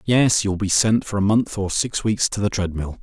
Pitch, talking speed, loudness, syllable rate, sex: 100 Hz, 260 wpm, -20 LUFS, 4.8 syllables/s, male